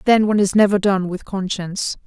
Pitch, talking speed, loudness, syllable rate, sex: 195 Hz, 205 wpm, -18 LUFS, 6.0 syllables/s, female